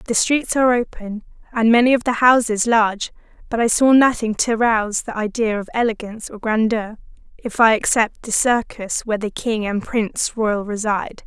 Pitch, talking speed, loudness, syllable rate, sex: 225 Hz, 180 wpm, -18 LUFS, 5.1 syllables/s, female